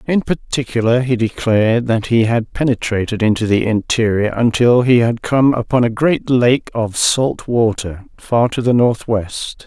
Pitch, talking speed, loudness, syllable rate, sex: 115 Hz, 160 wpm, -15 LUFS, 4.4 syllables/s, male